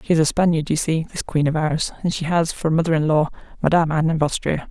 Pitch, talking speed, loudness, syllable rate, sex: 160 Hz, 255 wpm, -20 LUFS, 6.5 syllables/s, female